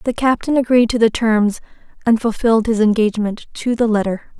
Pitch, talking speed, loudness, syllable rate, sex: 225 Hz, 180 wpm, -16 LUFS, 5.5 syllables/s, female